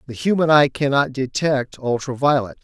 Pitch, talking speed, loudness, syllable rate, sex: 135 Hz, 160 wpm, -19 LUFS, 5.0 syllables/s, male